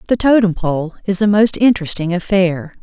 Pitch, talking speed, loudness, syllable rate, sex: 190 Hz, 170 wpm, -15 LUFS, 5.3 syllables/s, female